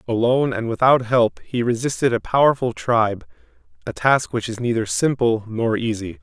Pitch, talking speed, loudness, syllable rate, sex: 120 Hz, 165 wpm, -20 LUFS, 5.2 syllables/s, male